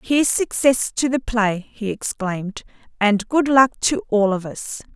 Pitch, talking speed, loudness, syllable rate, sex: 235 Hz, 170 wpm, -20 LUFS, 4.2 syllables/s, female